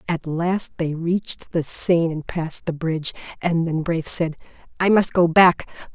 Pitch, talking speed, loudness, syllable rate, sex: 165 Hz, 180 wpm, -21 LUFS, 4.6 syllables/s, female